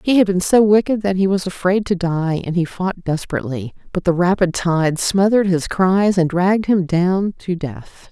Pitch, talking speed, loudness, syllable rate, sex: 185 Hz, 200 wpm, -17 LUFS, 4.9 syllables/s, female